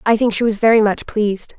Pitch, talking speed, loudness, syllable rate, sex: 215 Hz, 265 wpm, -16 LUFS, 6.1 syllables/s, female